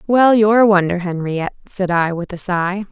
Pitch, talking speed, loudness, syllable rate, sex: 190 Hz, 205 wpm, -16 LUFS, 5.4 syllables/s, female